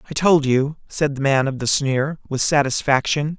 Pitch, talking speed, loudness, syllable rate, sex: 140 Hz, 195 wpm, -19 LUFS, 4.7 syllables/s, male